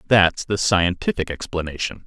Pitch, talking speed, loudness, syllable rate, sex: 90 Hz, 115 wpm, -21 LUFS, 4.8 syllables/s, male